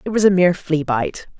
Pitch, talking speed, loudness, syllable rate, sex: 175 Hz, 260 wpm, -18 LUFS, 5.8 syllables/s, female